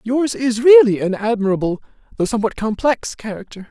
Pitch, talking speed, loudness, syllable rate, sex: 215 Hz, 145 wpm, -16 LUFS, 5.6 syllables/s, male